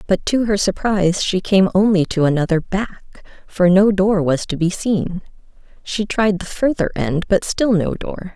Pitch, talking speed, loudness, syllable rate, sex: 190 Hz, 185 wpm, -17 LUFS, 4.5 syllables/s, female